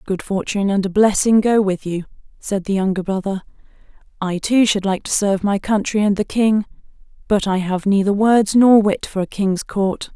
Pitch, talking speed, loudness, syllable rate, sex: 200 Hz, 200 wpm, -18 LUFS, 5.1 syllables/s, female